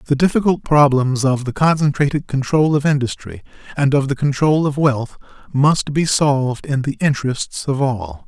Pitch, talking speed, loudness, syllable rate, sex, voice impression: 140 Hz, 165 wpm, -17 LUFS, 4.8 syllables/s, male, masculine, middle-aged, slightly relaxed, powerful, slightly muffled, raspy, cool, intellectual, calm, slightly mature, reassuring, wild, kind, modest